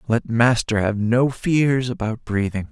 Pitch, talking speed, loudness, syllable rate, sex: 120 Hz, 155 wpm, -20 LUFS, 3.9 syllables/s, male